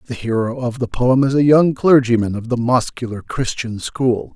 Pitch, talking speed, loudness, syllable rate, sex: 125 Hz, 195 wpm, -17 LUFS, 4.8 syllables/s, male